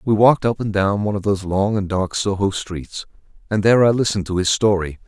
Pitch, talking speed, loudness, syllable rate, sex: 100 Hz, 235 wpm, -19 LUFS, 6.3 syllables/s, male